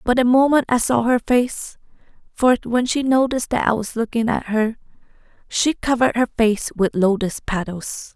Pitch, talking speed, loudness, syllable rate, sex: 235 Hz, 175 wpm, -19 LUFS, 4.8 syllables/s, female